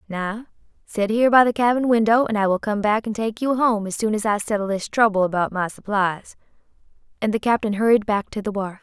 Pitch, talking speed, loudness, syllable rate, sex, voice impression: 215 Hz, 230 wpm, -21 LUFS, 5.8 syllables/s, female, feminine, slightly young, tensed, powerful, bright, soft, clear, intellectual, friendly, reassuring, sweet, kind